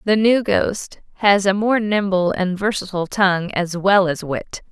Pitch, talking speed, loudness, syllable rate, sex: 195 Hz, 180 wpm, -18 LUFS, 4.4 syllables/s, female